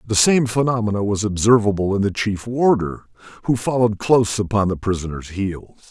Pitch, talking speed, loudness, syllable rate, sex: 105 Hz, 165 wpm, -19 LUFS, 5.7 syllables/s, male